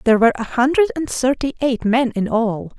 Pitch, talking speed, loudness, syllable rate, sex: 245 Hz, 215 wpm, -18 LUFS, 5.6 syllables/s, female